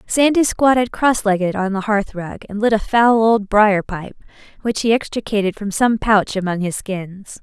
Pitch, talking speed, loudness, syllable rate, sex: 210 Hz, 185 wpm, -17 LUFS, 4.6 syllables/s, female